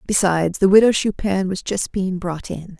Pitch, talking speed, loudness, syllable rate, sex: 185 Hz, 195 wpm, -19 LUFS, 4.9 syllables/s, female